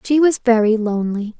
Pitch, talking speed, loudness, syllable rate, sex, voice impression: 230 Hz, 170 wpm, -17 LUFS, 5.7 syllables/s, female, feminine, adult-like, tensed, slightly bright, slightly soft, clear, fluent, slightly friendly, reassuring, elegant, lively, kind